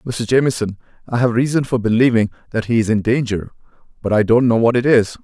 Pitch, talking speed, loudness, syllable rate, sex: 115 Hz, 220 wpm, -17 LUFS, 6.0 syllables/s, male